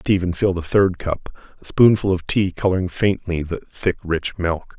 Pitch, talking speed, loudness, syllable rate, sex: 90 Hz, 190 wpm, -20 LUFS, 4.9 syllables/s, male